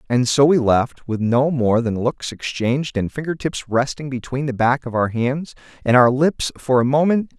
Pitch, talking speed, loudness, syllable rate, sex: 130 Hz, 210 wpm, -19 LUFS, 4.7 syllables/s, male